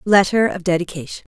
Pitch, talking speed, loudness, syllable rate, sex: 180 Hz, 135 wpm, -18 LUFS, 5.9 syllables/s, female